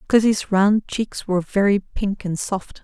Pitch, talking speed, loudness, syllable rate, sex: 200 Hz, 170 wpm, -21 LUFS, 4.1 syllables/s, female